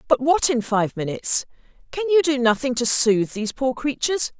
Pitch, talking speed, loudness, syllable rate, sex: 255 Hz, 190 wpm, -20 LUFS, 5.7 syllables/s, female